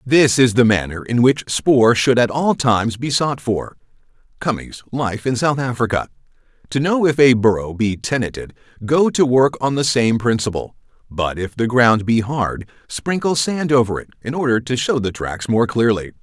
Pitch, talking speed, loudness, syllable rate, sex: 120 Hz, 190 wpm, -17 LUFS, 4.4 syllables/s, male